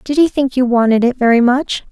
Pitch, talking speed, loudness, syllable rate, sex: 255 Hz, 250 wpm, -13 LUFS, 5.7 syllables/s, female